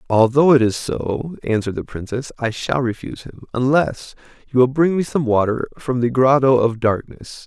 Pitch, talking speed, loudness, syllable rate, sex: 125 Hz, 185 wpm, -18 LUFS, 5.0 syllables/s, male